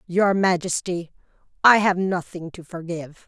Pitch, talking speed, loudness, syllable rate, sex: 180 Hz, 130 wpm, -21 LUFS, 4.7 syllables/s, female